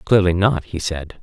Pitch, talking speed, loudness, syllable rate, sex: 90 Hz, 195 wpm, -19 LUFS, 4.2 syllables/s, male